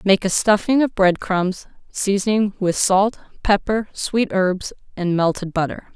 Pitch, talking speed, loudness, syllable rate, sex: 195 Hz, 150 wpm, -19 LUFS, 4.1 syllables/s, female